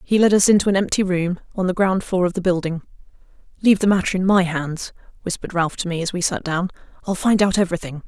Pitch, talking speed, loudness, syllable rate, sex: 185 Hz, 240 wpm, -20 LUFS, 6.6 syllables/s, female